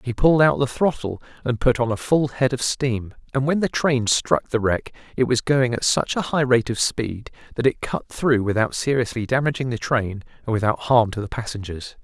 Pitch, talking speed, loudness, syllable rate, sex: 125 Hz, 225 wpm, -21 LUFS, 5.1 syllables/s, male